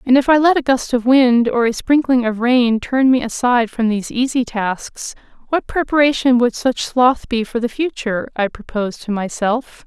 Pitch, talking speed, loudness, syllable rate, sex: 245 Hz, 200 wpm, -16 LUFS, 4.9 syllables/s, female